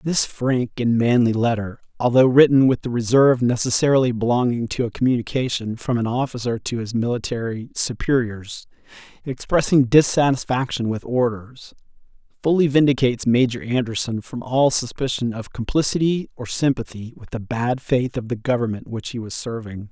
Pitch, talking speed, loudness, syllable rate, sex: 125 Hz, 145 wpm, -20 LUFS, 5.2 syllables/s, male